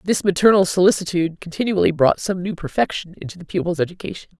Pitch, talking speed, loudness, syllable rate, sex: 180 Hz, 165 wpm, -19 LUFS, 6.7 syllables/s, female